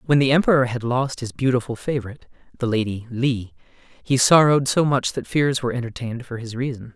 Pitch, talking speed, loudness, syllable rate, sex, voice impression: 125 Hz, 190 wpm, -21 LUFS, 5.8 syllables/s, male, masculine, slightly adult-like, slightly thick, very tensed, powerful, very bright, slightly soft, very clear, fluent, slightly raspy, very cool, intellectual, very refreshing, very sincere, calm, slightly mature, very friendly, very reassuring, unique, very elegant, slightly wild, sweet, very lively, kind, slightly intense